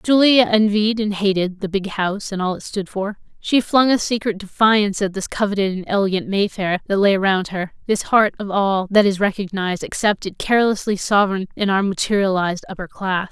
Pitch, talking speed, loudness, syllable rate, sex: 200 Hz, 190 wpm, -19 LUFS, 5.6 syllables/s, female